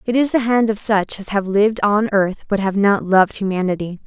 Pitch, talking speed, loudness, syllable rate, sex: 205 Hz, 235 wpm, -17 LUFS, 5.5 syllables/s, female